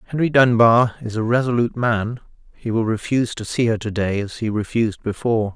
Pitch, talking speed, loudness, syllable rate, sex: 115 Hz, 195 wpm, -19 LUFS, 6.0 syllables/s, male